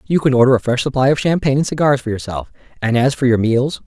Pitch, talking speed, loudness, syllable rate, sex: 130 Hz, 265 wpm, -16 LUFS, 6.8 syllables/s, male